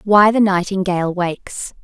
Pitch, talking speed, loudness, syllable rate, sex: 190 Hz, 130 wpm, -16 LUFS, 4.8 syllables/s, female